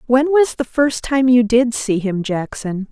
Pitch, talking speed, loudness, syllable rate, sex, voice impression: 240 Hz, 205 wpm, -17 LUFS, 4.0 syllables/s, female, feminine, adult-like, slightly clear, slightly intellectual, slightly calm, elegant